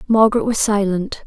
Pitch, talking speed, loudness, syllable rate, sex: 210 Hz, 145 wpm, -17 LUFS, 5.6 syllables/s, female